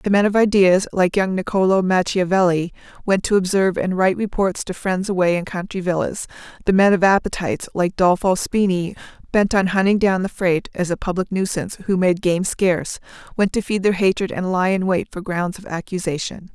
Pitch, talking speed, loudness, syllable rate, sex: 185 Hz, 195 wpm, -19 LUFS, 5.6 syllables/s, female